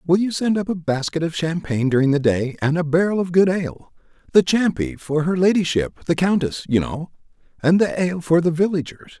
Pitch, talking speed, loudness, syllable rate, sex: 165 Hz, 200 wpm, -20 LUFS, 5.7 syllables/s, male